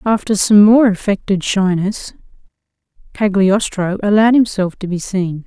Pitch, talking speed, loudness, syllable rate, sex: 200 Hz, 120 wpm, -14 LUFS, 4.6 syllables/s, female